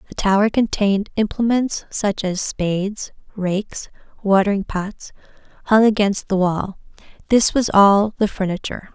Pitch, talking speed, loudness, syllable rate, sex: 200 Hz, 125 wpm, -19 LUFS, 4.6 syllables/s, female